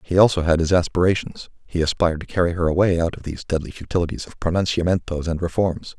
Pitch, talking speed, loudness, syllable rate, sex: 85 Hz, 200 wpm, -21 LUFS, 6.6 syllables/s, male